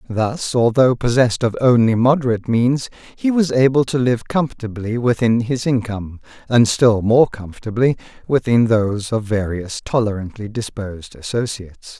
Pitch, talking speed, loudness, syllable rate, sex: 115 Hz, 135 wpm, -18 LUFS, 5.1 syllables/s, male